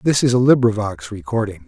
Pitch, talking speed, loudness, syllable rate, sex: 110 Hz, 180 wpm, -17 LUFS, 5.8 syllables/s, male